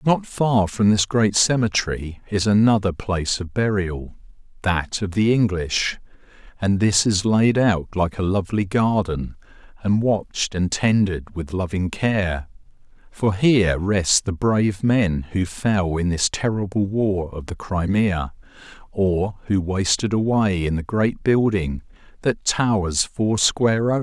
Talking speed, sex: 150 wpm, male